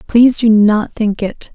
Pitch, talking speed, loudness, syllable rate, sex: 220 Hz, 195 wpm, -13 LUFS, 4.3 syllables/s, female